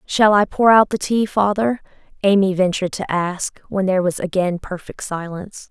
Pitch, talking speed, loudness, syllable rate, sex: 195 Hz, 180 wpm, -18 LUFS, 5.1 syllables/s, female